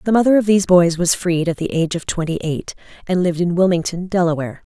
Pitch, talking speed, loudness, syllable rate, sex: 175 Hz, 230 wpm, -17 LUFS, 6.7 syllables/s, female